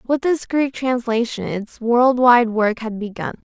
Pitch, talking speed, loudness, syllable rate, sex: 240 Hz, 155 wpm, -19 LUFS, 3.9 syllables/s, female